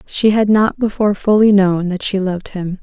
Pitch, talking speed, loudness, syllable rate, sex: 200 Hz, 215 wpm, -15 LUFS, 5.2 syllables/s, female